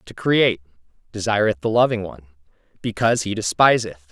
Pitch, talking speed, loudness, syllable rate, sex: 105 Hz, 130 wpm, -20 LUFS, 6.0 syllables/s, male